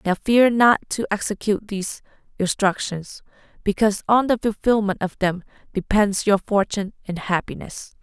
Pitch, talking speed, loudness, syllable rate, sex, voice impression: 205 Hz, 135 wpm, -21 LUFS, 5.1 syllables/s, female, feminine, slightly young, slightly adult-like, thin, tensed, powerful, bright, slightly hard, clear, slightly halting, slightly cute, slightly cool, very intellectual, slightly refreshing, sincere, very calm, slightly friendly, slightly reassuring, elegant, slightly sweet, slightly lively, slightly kind, slightly modest